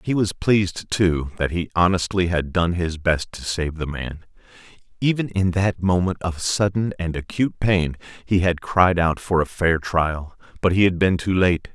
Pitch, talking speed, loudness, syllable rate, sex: 90 Hz, 195 wpm, -21 LUFS, 4.5 syllables/s, male